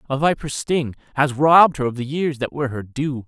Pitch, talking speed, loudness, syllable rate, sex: 140 Hz, 240 wpm, -20 LUFS, 5.6 syllables/s, male